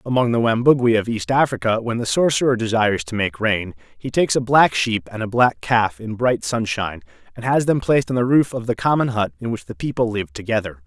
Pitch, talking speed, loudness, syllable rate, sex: 115 Hz, 230 wpm, -19 LUFS, 5.8 syllables/s, male